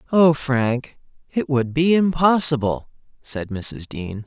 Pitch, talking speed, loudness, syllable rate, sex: 140 Hz, 125 wpm, -20 LUFS, 3.5 syllables/s, male